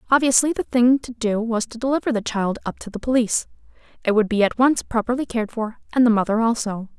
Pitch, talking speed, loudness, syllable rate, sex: 230 Hz, 225 wpm, -21 LUFS, 6.2 syllables/s, female